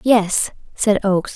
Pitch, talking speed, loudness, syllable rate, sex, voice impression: 205 Hz, 135 wpm, -18 LUFS, 3.9 syllables/s, female, feminine, adult-like, slightly relaxed, slightly soft, slightly raspy, intellectual, calm, friendly, reassuring, lively, slightly kind, slightly modest